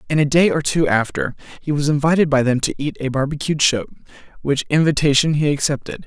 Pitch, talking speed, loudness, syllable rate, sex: 145 Hz, 200 wpm, -18 LUFS, 5.9 syllables/s, male